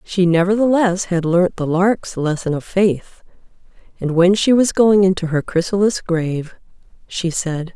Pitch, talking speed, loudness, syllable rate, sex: 180 Hz, 155 wpm, -17 LUFS, 4.4 syllables/s, female